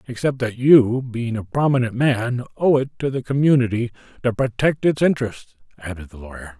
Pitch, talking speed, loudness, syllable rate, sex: 120 Hz, 175 wpm, -20 LUFS, 5.2 syllables/s, male